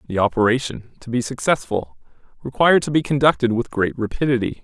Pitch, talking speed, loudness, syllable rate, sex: 125 Hz, 155 wpm, -20 LUFS, 6.1 syllables/s, male